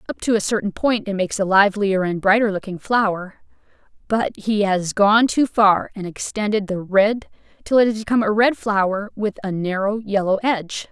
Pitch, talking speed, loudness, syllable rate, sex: 205 Hz, 190 wpm, -19 LUFS, 5.3 syllables/s, female